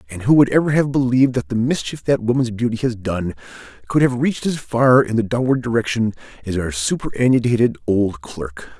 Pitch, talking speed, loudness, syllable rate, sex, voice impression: 120 Hz, 190 wpm, -18 LUFS, 5.5 syllables/s, male, masculine, adult-like, slightly thick, slightly fluent, cool, sincere, slightly calm, slightly elegant